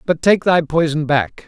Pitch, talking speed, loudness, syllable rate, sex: 155 Hz, 205 wpm, -16 LUFS, 4.4 syllables/s, male